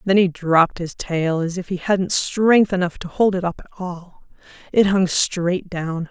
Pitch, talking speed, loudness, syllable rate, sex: 180 Hz, 205 wpm, -19 LUFS, 4.2 syllables/s, female